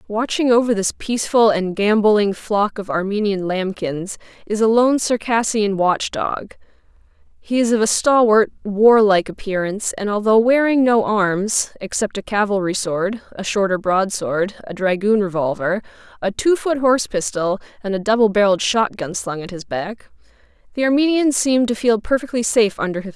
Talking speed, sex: 165 wpm, female